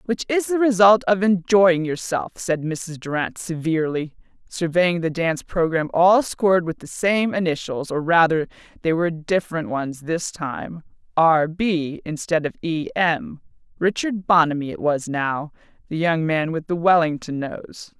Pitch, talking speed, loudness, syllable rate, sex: 170 Hz, 155 wpm, -21 LUFS, 4.5 syllables/s, female